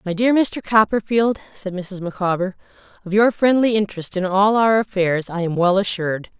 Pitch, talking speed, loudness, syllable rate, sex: 200 Hz, 180 wpm, -19 LUFS, 5.2 syllables/s, female